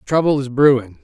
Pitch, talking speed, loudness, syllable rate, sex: 135 Hz, 175 wpm, -16 LUFS, 5.4 syllables/s, male